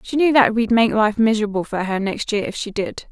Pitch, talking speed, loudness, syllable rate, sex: 220 Hz, 270 wpm, -19 LUFS, 5.7 syllables/s, female